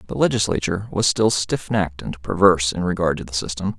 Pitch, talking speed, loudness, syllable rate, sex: 90 Hz, 205 wpm, -20 LUFS, 6.2 syllables/s, male